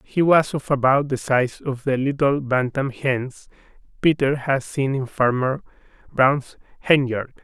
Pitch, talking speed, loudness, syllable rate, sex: 135 Hz, 145 wpm, -21 LUFS, 4.0 syllables/s, male